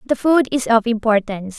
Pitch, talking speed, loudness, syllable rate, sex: 230 Hz, 190 wpm, -17 LUFS, 5.3 syllables/s, female